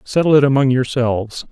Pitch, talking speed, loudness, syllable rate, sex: 130 Hz, 160 wpm, -15 LUFS, 5.8 syllables/s, male